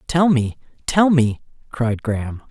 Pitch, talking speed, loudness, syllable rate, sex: 135 Hz, 145 wpm, -19 LUFS, 4.0 syllables/s, male